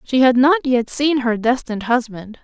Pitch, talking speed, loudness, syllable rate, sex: 250 Hz, 195 wpm, -17 LUFS, 4.7 syllables/s, female